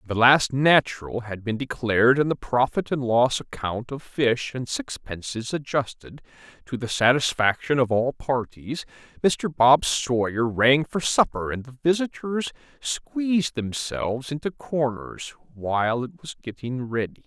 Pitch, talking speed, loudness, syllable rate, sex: 130 Hz, 145 wpm, -23 LUFS, 4.3 syllables/s, male